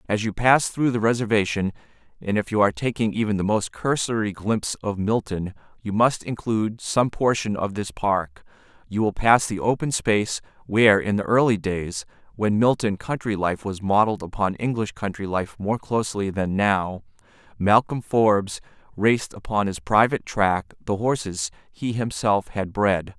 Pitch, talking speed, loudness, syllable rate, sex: 105 Hz, 160 wpm, -23 LUFS, 4.9 syllables/s, male